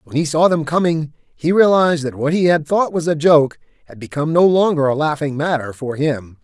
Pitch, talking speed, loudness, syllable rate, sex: 155 Hz, 225 wpm, -16 LUFS, 5.4 syllables/s, male